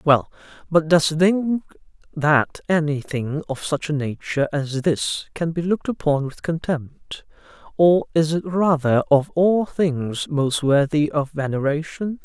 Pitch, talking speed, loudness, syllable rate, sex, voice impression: 155 Hz, 140 wpm, -21 LUFS, 4.0 syllables/s, male, masculine, slightly feminine, very gender-neutral, very adult-like, slightly middle-aged, slightly thin, relaxed, weak, dark, slightly soft, slightly muffled, fluent, slightly cool, very intellectual, slightly refreshing, very sincere, very calm, slightly mature, very friendly, reassuring, very unique, elegant, sweet, slightly lively, kind, modest, slightly light